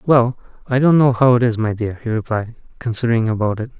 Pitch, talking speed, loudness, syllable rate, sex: 120 Hz, 220 wpm, -17 LUFS, 6.2 syllables/s, male